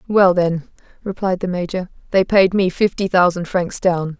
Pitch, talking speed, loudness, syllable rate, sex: 185 Hz, 170 wpm, -18 LUFS, 4.6 syllables/s, female